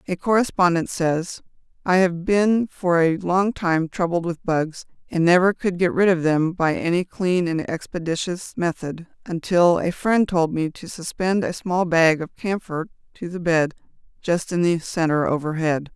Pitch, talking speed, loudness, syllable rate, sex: 175 Hz, 175 wpm, -21 LUFS, 4.4 syllables/s, female